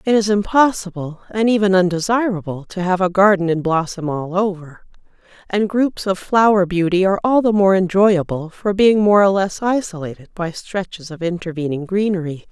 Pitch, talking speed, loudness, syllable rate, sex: 190 Hz, 170 wpm, -17 LUFS, 5.2 syllables/s, female